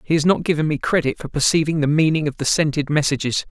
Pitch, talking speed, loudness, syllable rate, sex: 150 Hz, 240 wpm, -19 LUFS, 6.5 syllables/s, male